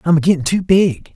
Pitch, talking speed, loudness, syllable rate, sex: 165 Hz, 260 wpm, -15 LUFS, 5.7 syllables/s, male